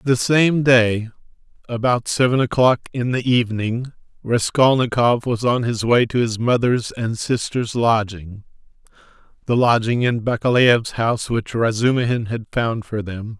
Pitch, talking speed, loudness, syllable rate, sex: 120 Hz, 135 wpm, -19 LUFS, 4.4 syllables/s, male